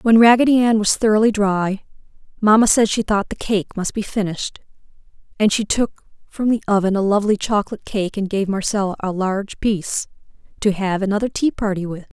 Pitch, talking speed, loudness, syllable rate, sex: 205 Hz, 180 wpm, -18 LUFS, 5.8 syllables/s, female